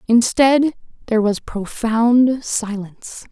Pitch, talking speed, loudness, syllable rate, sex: 230 Hz, 90 wpm, -17 LUFS, 3.7 syllables/s, female